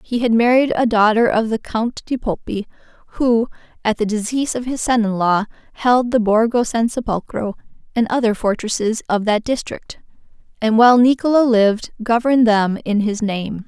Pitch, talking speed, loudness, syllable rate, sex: 225 Hz, 170 wpm, -17 LUFS, 5.1 syllables/s, female